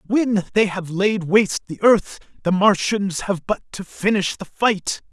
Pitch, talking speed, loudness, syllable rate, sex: 195 Hz, 175 wpm, -20 LUFS, 4.1 syllables/s, male